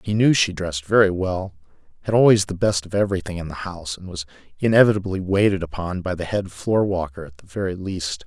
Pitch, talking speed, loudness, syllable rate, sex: 90 Hz, 210 wpm, -21 LUFS, 6.0 syllables/s, male